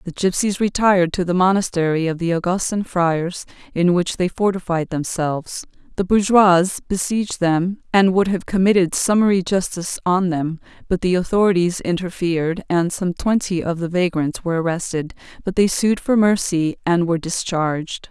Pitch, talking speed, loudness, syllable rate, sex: 180 Hz, 155 wpm, -19 LUFS, 5.1 syllables/s, female